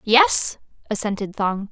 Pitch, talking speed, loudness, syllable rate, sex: 215 Hz, 105 wpm, -20 LUFS, 3.9 syllables/s, female